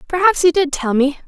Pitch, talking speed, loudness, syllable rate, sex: 315 Hz, 235 wpm, -15 LUFS, 5.6 syllables/s, female